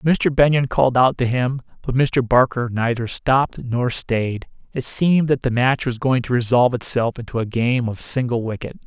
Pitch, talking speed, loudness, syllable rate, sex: 125 Hz, 195 wpm, -19 LUFS, 4.9 syllables/s, male